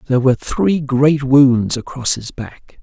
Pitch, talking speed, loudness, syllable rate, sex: 135 Hz, 170 wpm, -15 LUFS, 4.2 syllables/s, male